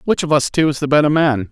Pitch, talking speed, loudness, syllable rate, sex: 145 Hz, 315 wpm, -15 LUFS, 6.5 syllables/s, male